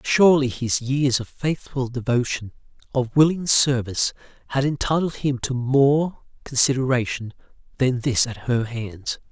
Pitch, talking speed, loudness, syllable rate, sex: 130 Hz, 130 wpm, -21 LUFS, 4.5 syllables/s, male